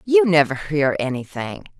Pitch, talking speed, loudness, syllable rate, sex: 160 Hz, 135 wpm, -19 LUFS, 4.5 syllables/s, female